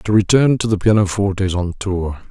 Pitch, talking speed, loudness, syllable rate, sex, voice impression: 100 Hz, 210 wpm, -17 LUFS, 5.7 syllables/s, male, masculine, adult-like, thick, tensed, powerful, dark, clear, cool, calm, mature, wild, lively, strict